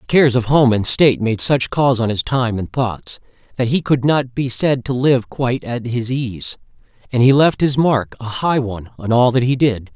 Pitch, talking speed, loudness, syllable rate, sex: 125 Hz, 225 wpm, -17 LUFS, 4.8 syllables/s, male